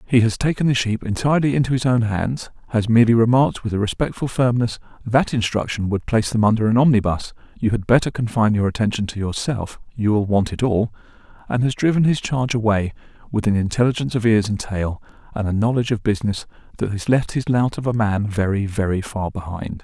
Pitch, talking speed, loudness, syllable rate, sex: 115 Hz, 200 wpm, -20 LUFS, 6.1 syllables/s, male